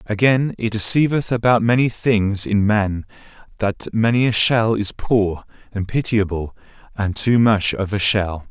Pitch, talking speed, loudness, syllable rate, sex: 110 Hz, 155 wpm, -18 LUFS, 4.2 syllables/s, male